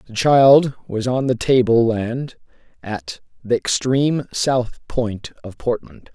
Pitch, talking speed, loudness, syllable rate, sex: 120 Hz, 135 wpm, -18 LUFS, 3.6 syllables/s, male